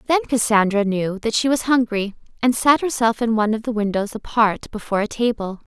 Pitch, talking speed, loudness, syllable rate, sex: 225 Hz, 200 wpm, -20 LUFS, 5.7 syllables/s, female